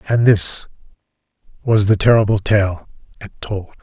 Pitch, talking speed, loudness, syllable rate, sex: 105 Hz, 125 wpm, -16 LUFS, 4.5 syllables/s, male